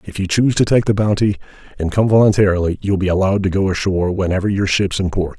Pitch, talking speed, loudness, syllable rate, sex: 95 Hz, 235 wpm, -16 LUFS, 6.8 syllables/s, male